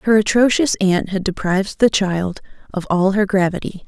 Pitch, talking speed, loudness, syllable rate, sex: 195 Hz, 170 wpm, -17 LUFS, 5.0 syllables/s, female